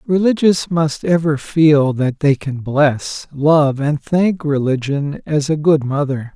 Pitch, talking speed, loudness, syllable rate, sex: 150 Hz, 150 wpm, -16 LUFS, 3.6 syllables/s, male